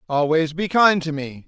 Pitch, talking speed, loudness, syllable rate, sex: 160 Hz, 205 wpm, -19 LUFS, 4.7 syllables/s, male